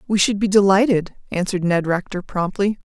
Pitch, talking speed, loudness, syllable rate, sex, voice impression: 195 Hz, 165 wpm, -19 LUFS, 5.5 syllables/s, female, feminine, adult-like, bright, clear, fluent, intellectual, calm, elegant, lively, slightly sharp